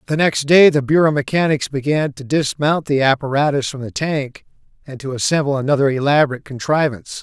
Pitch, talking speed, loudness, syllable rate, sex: 140 Hz, 165 wpm, -17 LUFS, 5.9 syllables/s, male